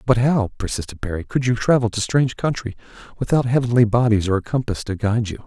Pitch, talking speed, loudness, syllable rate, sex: 115 Hz, 210 wpm, -20 LUFS, 6.4 syllables/s, male